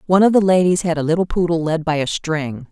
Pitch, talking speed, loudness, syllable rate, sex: 170 Hz, 265 wpm, -17 LUFS, 6.3 syllables/s, female